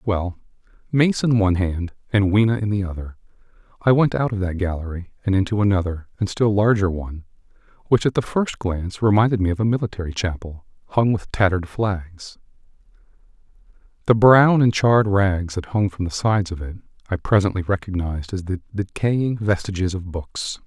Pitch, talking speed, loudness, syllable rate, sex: 100 Hz, 170 wpm, -21 LUFS, 5.5 syllables/s, male